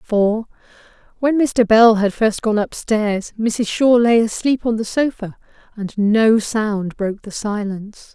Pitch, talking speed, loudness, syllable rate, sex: 220 Hz, 160 wpm, -17 LUFS, 3.9 syllables/s, female